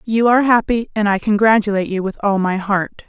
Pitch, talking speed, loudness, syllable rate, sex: 210 Hz, 215 wpm, -16 LUFS, 5.8 syllables/s, female